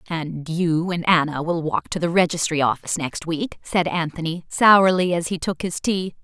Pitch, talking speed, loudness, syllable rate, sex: 170 Hz, 190 wpm, -21 LUFS, 4.7 syllables/s, female